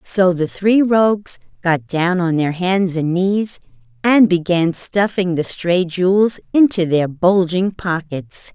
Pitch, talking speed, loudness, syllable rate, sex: 180 Hz, 145 wpm, -16 LUFS, 3.7 syllables/s, female